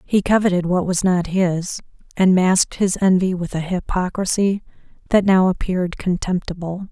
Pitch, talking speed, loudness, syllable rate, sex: 185 Hz, 150 wpm, -19 LUFS, 4.9 syllables/s, female